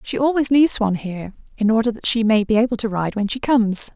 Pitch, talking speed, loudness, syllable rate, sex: 225 Hz, 260 wpm, -18 LUFS, 6.7 syllables/s, female